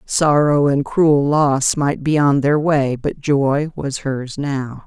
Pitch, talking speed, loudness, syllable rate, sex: 140 Hz, 175 wpm, -17 LUFS, 3.2 syllables/s, female